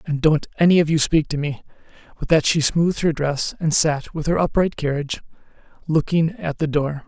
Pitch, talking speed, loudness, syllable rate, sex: 155 Hz, 205 wpm, -20 LUFS, 5.4 syllables/s, male